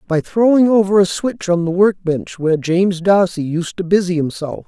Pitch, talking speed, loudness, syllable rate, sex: 185 Hz, 205 wpm, -16 LUFS, 5.2 syllables/s, male